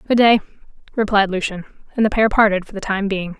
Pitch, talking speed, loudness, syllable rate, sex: 205 Hz, 210 wpm, -18 LUFS, 6.3 syllables/s, female